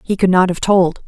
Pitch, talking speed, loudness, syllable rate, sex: 185 Hz, 280 wpm, -14 LUFS, 5.2 syllables/s, female